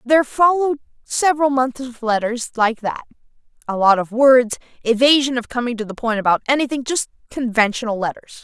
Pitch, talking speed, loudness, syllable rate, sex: 245 Hz, 165 wpm, -18 LUFS, 5.7 syllables/s, female